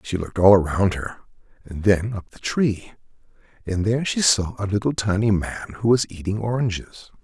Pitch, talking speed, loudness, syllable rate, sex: 100 Hz, 180 wpm, -21 LUFS, 5.0 syllables/s, male